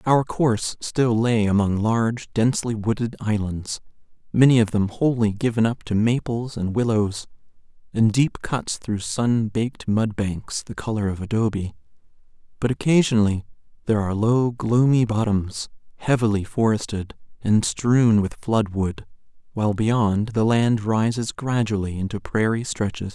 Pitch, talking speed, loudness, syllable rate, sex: 110 Hz, 130 wpm, -22 LUFS, 4.6 syllables/s, male